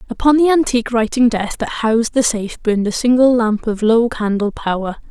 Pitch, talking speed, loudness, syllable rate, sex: 230 Hz, 200 wpm, -16 LUFS, 5.6 syllables/s, female